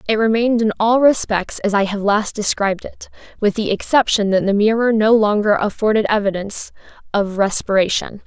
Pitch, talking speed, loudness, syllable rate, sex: 210 Hz, 165 wpm, -17 LUFS, 5.5 syllables/s, female